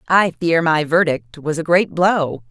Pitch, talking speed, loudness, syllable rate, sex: 160 Hz, 190 wpm, -17 LUFS, 4.0 syllables/s, female